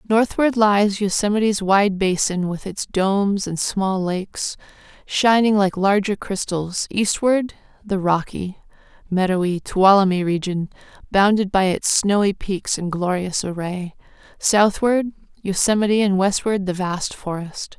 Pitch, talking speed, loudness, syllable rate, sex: 195 Hz, 120 wpm, -20 LUFS, 4.2 syllables/s, female